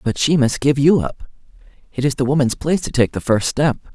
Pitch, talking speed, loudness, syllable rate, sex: 130 Hz, 245 wpm, -18 LUFS, 5.9 syllables/s, male